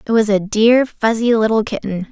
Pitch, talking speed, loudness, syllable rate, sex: 220 Hz, 200 wpm, -15 LUFS, 5.1 syllables/s, female